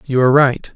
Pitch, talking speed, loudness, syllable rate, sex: 135 Hz, 240 wpm, -14 LUFS, 6.2 syllables/s, male